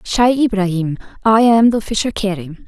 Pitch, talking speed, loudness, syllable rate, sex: 210 Hz, 155 wpm, -15 LUFS, 4.8 syllables/s, female